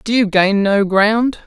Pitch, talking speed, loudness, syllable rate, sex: 210 Hz, 205 wpm, -14 LUFS, 3.8 syllables/s, female